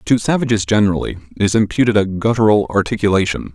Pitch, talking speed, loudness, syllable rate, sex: 105 Hz, 135 wpm, -16 LUFS, 6.5 syllables/s, male